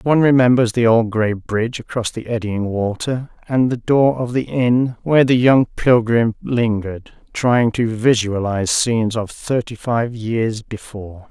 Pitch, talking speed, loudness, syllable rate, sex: 115 Hz, 160 wpm, -17 LUFS, 4.5 syllables/s, male